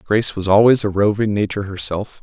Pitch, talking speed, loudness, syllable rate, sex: 100 Hz, 190 wpm, -17 LUFS, 5.9 syllables/s, male